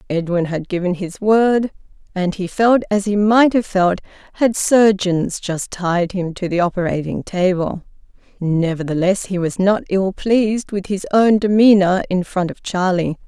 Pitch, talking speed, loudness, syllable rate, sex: 190 Hz, 165 wpm, -17 LUFS, 4.4 syllables/s, female